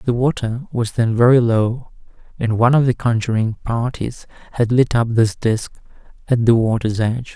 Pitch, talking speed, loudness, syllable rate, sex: 115 Hz, 170 wpm, -18 LUFS, 4.9 syllables/s, male